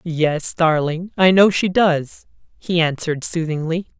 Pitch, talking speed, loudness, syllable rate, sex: 165 Hz, 135 wpm, -18 LUFS, 4.1 syllables/s, female